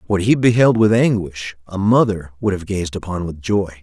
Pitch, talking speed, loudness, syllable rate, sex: 100 Hz, 205 wpm, -17 LUFS, 4.9 syllables/s, male